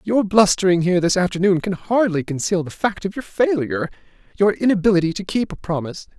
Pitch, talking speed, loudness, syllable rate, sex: 185 Hz, 175 wpm, -19 LUFS, 6.2 syllables/s, male